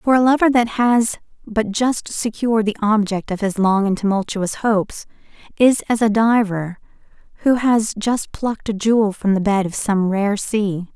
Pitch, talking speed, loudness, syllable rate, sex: 215 Hz, 180 wpm, -18 LUFS, 4.6 syllables/s, female